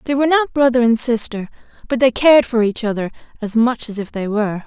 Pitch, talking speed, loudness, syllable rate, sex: 235 Hz, 230 wpm, -16 LUFS, 6.3 syllables/s, female